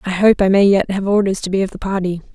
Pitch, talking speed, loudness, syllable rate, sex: 195 Hz, 305 wpm, -16 LUFS, 6.6 syllables/s, female